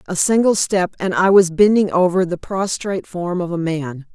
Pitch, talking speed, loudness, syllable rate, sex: 180 Hz, 205 wpm, -17 LUFS, 4.8 syllables/s, female